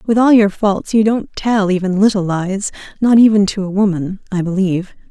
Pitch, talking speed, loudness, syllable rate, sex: 200 Hz, 190 wpm, -15 LUFS, 5.1 syllables/s, female